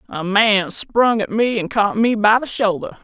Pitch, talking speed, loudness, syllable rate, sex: 215 Hz, 215 wpm, -17 LUFS, 4.4 syllables/s, female